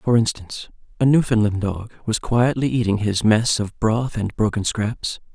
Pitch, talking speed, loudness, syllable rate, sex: 110 Hz, 170 wpm, -20 LUFS, 4.6 syllables/s, male